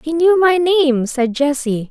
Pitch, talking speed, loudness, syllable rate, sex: 295 Hz, 190 wpm, -15 LUFS, 3.9 syllables/s, female